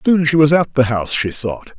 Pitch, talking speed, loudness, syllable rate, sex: 135 Hz, 270 wpm, -15 LUFS, 5.5 syllables/s, male